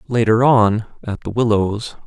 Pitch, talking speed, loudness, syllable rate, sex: 110 Hz, 145 wpm, -17 LUFS, 4.2 syllables/s, male